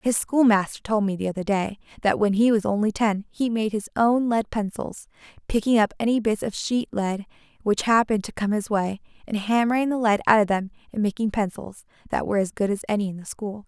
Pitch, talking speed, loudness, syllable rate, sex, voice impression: 215 Hz, 225 wpm, -23 LUFS, 5.7 syllables/s, female, feminine, slightly adult-like, cute, refreshing, friendly, slightly kind